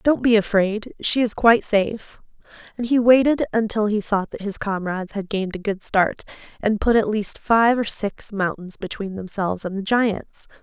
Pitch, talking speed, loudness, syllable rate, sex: 210 Hz, 190 wpm, -21 LUFS, 4.9 syllables/s, female